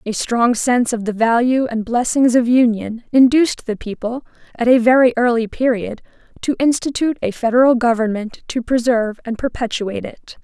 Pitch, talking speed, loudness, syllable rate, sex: 240 Hz, 160 wpm, -17 LUFS, 5.4 syllables/s, female